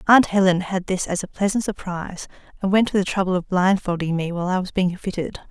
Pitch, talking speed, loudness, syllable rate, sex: 185 Hz, 230 wpm, -21 LUFS, 6.1 syllables/s, female